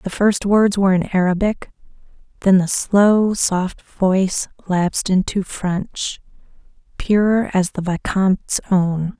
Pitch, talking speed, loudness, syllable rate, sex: 190 Hz, 125 wpm, -18 LUFS, 3.7 syllables/s, female